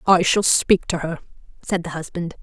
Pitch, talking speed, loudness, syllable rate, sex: 170 Hz, 200 wpm, -20 LUFS, 4.9 syllables/s, female